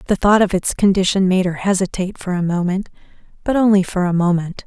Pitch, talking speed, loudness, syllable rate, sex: 190 Hz, 205 wpm, -17 LUFS, 6.1 syllables/s, female